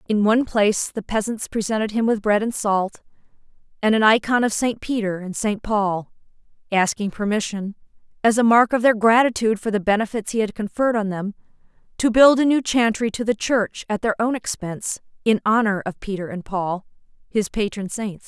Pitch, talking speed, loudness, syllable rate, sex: 215 Hz, 185 wpm, -21 LUFS, 5.4 syllables/s, female